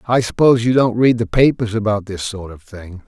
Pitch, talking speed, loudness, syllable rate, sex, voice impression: 110 Hz, 235 wpm, -16 LUFS, 5.5 syllables/s, male, very masculine, very adult-like, slightly old, very thick, tensed, very powerful, slightly dark, slightly hard, clear, fluent, very cool, very intellectual, very sincere, very calm, very mature, friendly, very reassuring, unique, elegant, wild, sweet, slightly lively, kind